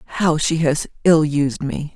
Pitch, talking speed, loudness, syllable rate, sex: 155 Hz, 185 wpm, -18 LUFS, 4.3 syllables/s, female